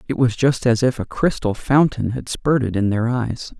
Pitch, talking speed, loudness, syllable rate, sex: 120 Hz, 215 wpm, -19 LUFS, 4.7 syllables/s, male